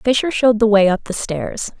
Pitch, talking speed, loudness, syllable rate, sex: 220 Hz, 235 wpm, -16 LUFS, 5.3 syllables/s, female